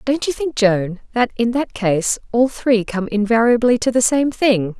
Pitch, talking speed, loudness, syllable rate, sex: 230 Hz, 200 wpm, -17 LUFS, 4.4 syllables/s, female